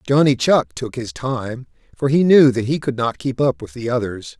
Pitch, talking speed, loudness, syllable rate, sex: 130 Hz, 230 wpm, -18 LUFS, 4.8 syllables/s, male